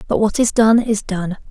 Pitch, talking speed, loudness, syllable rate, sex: 215 Hz, 240 wpm, -16 LUFS, 4.8 syllables/s, female